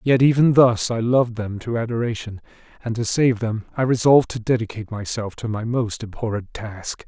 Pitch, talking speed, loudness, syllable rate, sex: 115 Hz, 185 wpm, -21 LUFS, 5.5 syllables/s, male